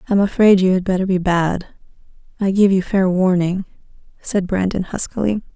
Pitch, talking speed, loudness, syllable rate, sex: 190 Hz, 160 wpm, -17 LUFS, 5.4 syllables/s, female